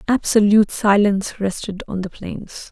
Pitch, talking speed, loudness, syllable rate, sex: 205 Hz, 135 wpm, -18 LUFS, 4.8 syllables/s, female